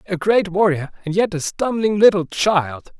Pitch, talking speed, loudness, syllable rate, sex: 185 Hz, 180 wpm, -18 LUFS, 4.4 syllables/s, male